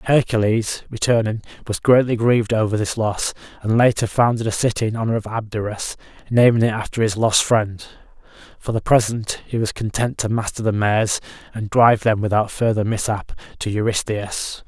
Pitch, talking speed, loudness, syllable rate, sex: 110 Hz, 170 wpm, -19 LUFS, 5.3 syllables/s, male